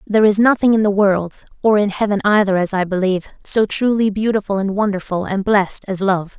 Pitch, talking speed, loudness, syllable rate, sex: 200 Hz, 190 wpm, -17 LUFS, 5.9 syllables/s, female